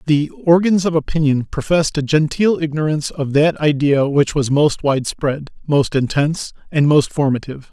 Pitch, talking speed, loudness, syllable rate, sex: 150 Hz, 155 wpm, -17 LUFS, 5.1 syllables/s, male